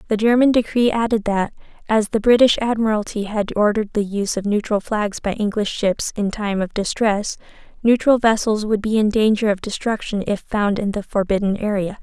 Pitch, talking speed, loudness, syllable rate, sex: 215 Hz, 185 wpm, -19 LUFS, 5.3 syllables/s, female